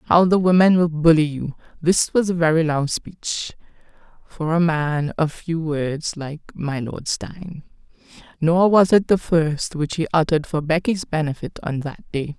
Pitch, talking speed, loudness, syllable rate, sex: 160 Hz, 175 wpm, -20 LUFS, 4.3 syllables/s, female